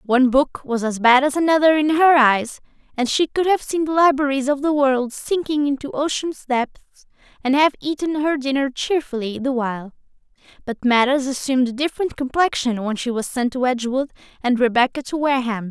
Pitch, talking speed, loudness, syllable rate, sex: 270 Hz, 185 wpm, -19 LUFS, 5.5 syllables/s, female